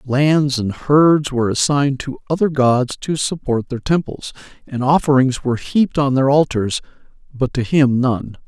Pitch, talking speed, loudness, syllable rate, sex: 135 Hz, 165 wpm, -17 LUFS, 4.6 syllables/s, male